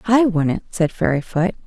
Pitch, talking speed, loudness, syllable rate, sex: 185 Hz, 145 wpm, -19 LUFS, 4.4 syllables/s, female